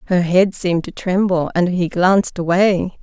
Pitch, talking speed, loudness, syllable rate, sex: 180 Hz, 180 wpm, -17 LUFS, 4.7 syllables/s, female